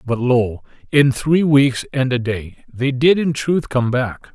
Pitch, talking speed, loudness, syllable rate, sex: 130 Hz, 195 wpm, -17 LUFS, 3.8 syllables/s, male